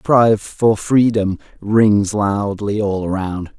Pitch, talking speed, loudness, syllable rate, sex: 105 Hz, 135 wpm, -16 LUFS, 3.3 syllables/s, male